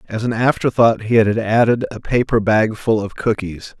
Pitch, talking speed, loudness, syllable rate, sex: 110 Hz, 190 wpm, -17 LUFS, 4.7 syllables/s, male